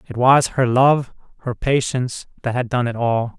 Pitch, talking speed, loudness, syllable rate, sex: 125 Hz, 195 wpm, -19 LUFS, 4.7 syllables/s, male